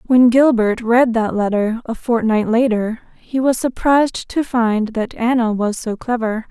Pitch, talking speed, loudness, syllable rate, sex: 230 Hz, 165 wpm, -17 LUFS, 4.3 syllables/s, female